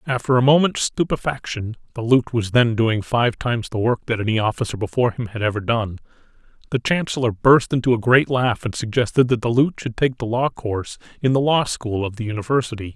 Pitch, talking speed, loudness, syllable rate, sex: 120 Hz, 210 wpm, -20 LUFS, 4.0 syllables/s, male